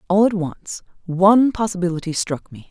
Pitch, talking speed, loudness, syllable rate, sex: 185 Hz, 155 wpm, -19 LUFS, 5.2 syllables/s, female